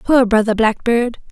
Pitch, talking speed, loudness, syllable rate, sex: 230 Hz, 135 wpm, -15 LUFS, 4.4 syllables/s, female